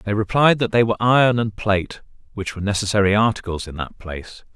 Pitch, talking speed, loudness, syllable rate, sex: 105 Hz, 200 wpm, -19 LUFS, 6.3 syllables/s, male